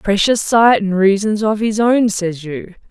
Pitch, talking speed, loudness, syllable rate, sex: 205 Hz, 185 wpm, -14 LUFS, 4.0 syllables/s, female